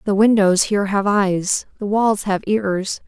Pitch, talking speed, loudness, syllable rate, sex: 200 Hz, 175 wpm, -18 LUFS, 4.0 syllables/s, female